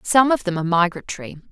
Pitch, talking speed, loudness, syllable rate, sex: 190 Hz, 200 wpm, -19 LUFS, 7.0 syllables/s, female